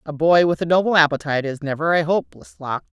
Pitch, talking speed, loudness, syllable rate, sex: 160 Hz, 220 wpm, -19 LUFS, 6.6 syllables/s, female